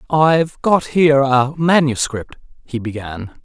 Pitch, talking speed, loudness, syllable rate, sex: 140 Hz, 120 wpm, -16 LUFS, 4.2 syllables/s, male